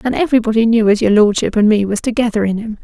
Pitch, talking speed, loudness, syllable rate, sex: 220 Hz, 255 wpm, -14 LUFS, 7.0 syllables/s, female